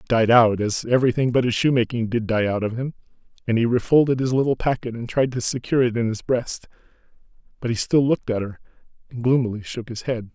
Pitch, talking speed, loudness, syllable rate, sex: 120 Hz, 220 wpm, -21 LUFS, 6.3 syllables/s, male